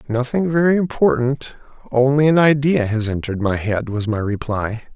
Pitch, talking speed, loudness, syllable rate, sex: 125 Hz, 155 wpm, -18 LUFS, 5.1 syllables/s, male